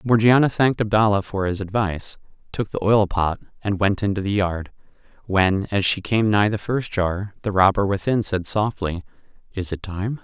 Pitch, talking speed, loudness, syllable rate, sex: 100 Hz, 180 wpm, -21 LUFS, 5.0 syllables/s, male